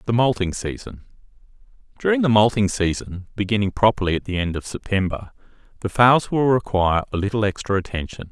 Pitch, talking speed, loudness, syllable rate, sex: 105 Hz, 150 wpm, -21 LUFS, 5.9 syllables/s, male